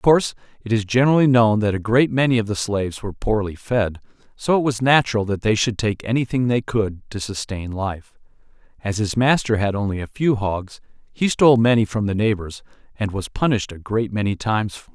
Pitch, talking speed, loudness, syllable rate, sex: 110 Hz, 215 wpm, -20 LUFS, 5.7 syllables/s, male